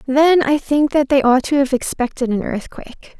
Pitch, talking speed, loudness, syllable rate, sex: 270 Hz, 205 wpm, -16 LUFS, 4.9 syllables/s, female